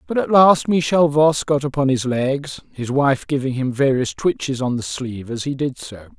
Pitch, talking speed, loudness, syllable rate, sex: 140 Hz, 215 wpm, -19 LUFS, 4.8 syllables/s, male